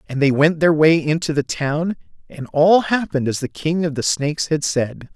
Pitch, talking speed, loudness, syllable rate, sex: 155 Hz, 220 wpm, -18 LUFS, 5.0 syllables/s, male